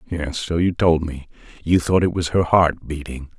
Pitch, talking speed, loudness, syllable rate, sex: 80 Hz, 195 wpm, -20 LUFS, 4.7 syllables/s, male